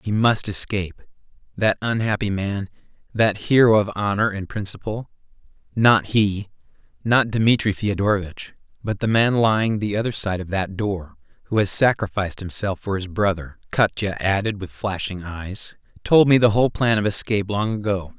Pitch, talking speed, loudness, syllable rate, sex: 105 Hz, 150 wpm, -21 LUFS, 5.0 syllables/s, male